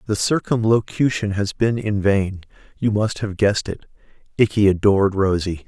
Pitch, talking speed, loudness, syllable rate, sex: 105 Hz, 125 wpm, -19 LUFS, 4.9 syllables/s, male